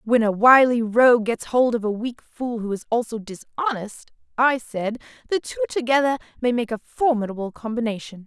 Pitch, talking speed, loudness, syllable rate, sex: 240 Hz, 175 wpm, -21 LUFS, 5.0 syllables/s, female